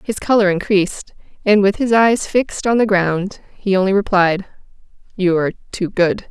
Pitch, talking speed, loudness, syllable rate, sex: 195 Hz, 170 wpm, -16 LUFS, 4.9 syllables/s, female